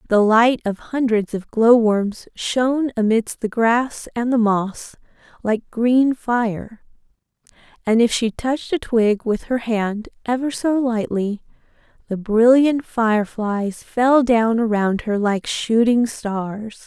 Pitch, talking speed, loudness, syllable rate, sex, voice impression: 230 Hz, 135 wpm, -19 LUFS, 3.5 syllables/s, female, feminine, adult-like, slightly clear, sincere, slightly calm, slightly kind